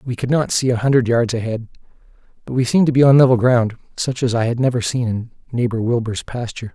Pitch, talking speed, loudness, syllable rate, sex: 120 Hz, 230 wpm, -18 LUFS, 6.3 syllables/s, male